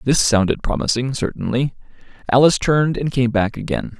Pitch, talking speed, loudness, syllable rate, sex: 130 Hz, 150 wpm, -18 LUFS, 5.7 syllables/s, male